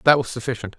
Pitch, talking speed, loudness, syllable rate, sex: 120 Hz, 230 wpm, -22 LUFS, 7.5 syllables/s, male